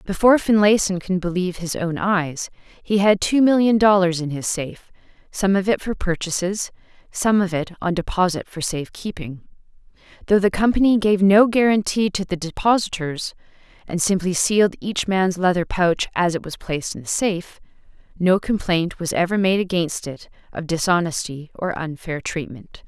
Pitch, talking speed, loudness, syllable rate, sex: 185 Hz, 165 wpm, -20 LUFS, 5.1 syllables/s, female